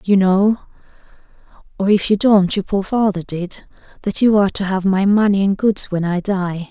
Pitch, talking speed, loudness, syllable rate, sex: 195 Hz, 195 wpm, -17 LUFS, 5.0 syllables/s, female